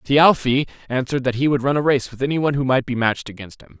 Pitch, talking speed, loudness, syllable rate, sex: 130 Hz, 270 wpm, -19 LUFS, 6.8 syllables/s, male